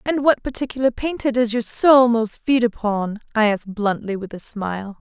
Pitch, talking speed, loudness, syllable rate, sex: 230 Hz, 190 wpm, -20 LUFS, 5.0 syllables/s, female